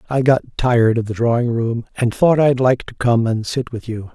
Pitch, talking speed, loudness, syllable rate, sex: 120 Hz, 245 wpm, -17 LUFS, 5.1 syllables/s, male